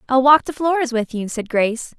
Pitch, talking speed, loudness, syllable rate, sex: 255 Hz, 240 wpm, -18 LUFS, 5.6 syllables/s, female